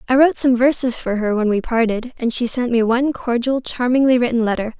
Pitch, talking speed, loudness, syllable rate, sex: 245 Hz, 225 wpm, -18 LUFS, 5.9 syllables/s, female